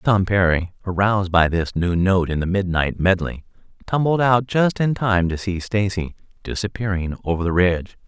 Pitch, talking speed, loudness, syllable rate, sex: 95 Hz, 170 wpm, -20 LUFS, 5.0 syllables/s, male